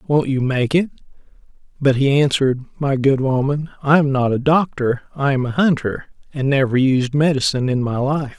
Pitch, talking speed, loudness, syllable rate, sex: 140 Hz, 185 wpm, -18 LUFS, 5.1 syllables/s, male